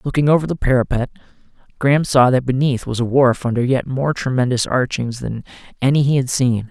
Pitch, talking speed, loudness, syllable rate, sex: 130 Hz, 190 wpm, -17 LUFS, 5.8 syllables/s, male